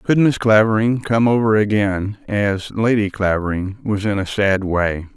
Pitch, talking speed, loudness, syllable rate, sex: 105 Hz, 165 wpm, -18 LUFS, 4.4 syllables/s, male